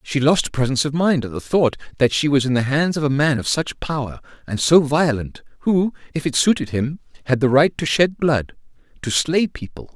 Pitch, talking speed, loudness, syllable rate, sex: 140 Hz, 225 wpm, -19 LUFS, 5.2 syllables/s, male